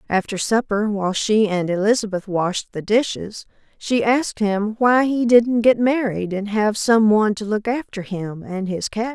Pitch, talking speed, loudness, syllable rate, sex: 215 Hz, 185 wpm, -19 LUFS, 4.6 syllables/s, female